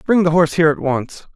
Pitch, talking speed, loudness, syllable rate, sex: 160 Hz, 265 wpm, -16 LUFS, 6.8 syllables/s, male